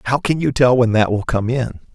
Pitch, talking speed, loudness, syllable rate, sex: 120 Hz, 280 wpm, -17 LUFS, 5.5 syllables/s, male